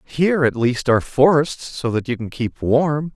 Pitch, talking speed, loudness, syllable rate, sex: 135 Hz, 210 wpm, -19 LUFS, 4.6 syllables/s, male